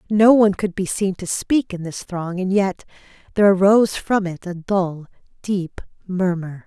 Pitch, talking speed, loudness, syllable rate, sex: 190 Hz, 180 wpm, -19 LUFS, 4.7 syllables/s, female